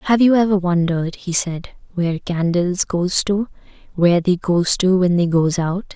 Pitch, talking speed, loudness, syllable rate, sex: 180 Hz, 170 wpm, -18 LUFS, 4.8 syllables/s, female